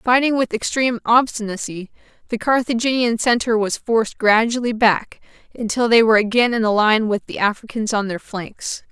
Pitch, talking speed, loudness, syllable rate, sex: 225 Hz, 160 wpm, -18 LUFS, 5.2 syllables/s, female